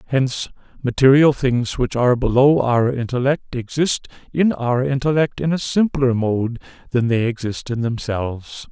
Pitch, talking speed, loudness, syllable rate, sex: 130 Hz, 145 wpm, -19 LUFS, 4.6 syllables/s, male